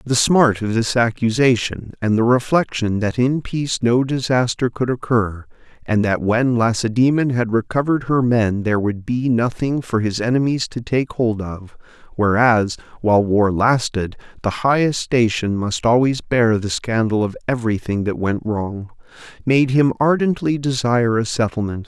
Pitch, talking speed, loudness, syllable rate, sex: 120 Hz, 155 wpm, -18 LUFS, 4.9 syllables/s, male